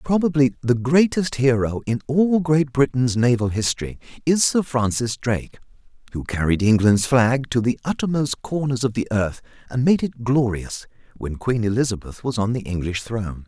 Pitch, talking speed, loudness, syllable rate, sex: 125 Hz, 165 wpm, -21 LUFS, 4.9 syllables/s, male